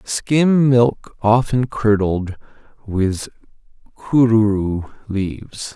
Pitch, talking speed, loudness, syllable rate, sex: 115 Hz, 75 wpm, -18 LUFS, 2.8 syllables/s, male